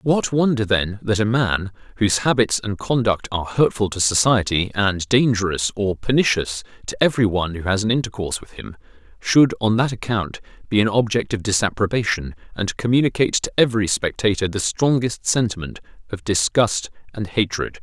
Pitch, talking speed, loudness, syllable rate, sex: 105 Hz, 160 wpm, -20 LUFS, 5.5 syllables/s, male